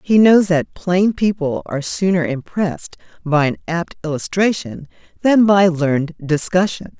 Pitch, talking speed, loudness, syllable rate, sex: 175 Hz, 135 wpm, -17 LUFS, 4.5 syllables/s, female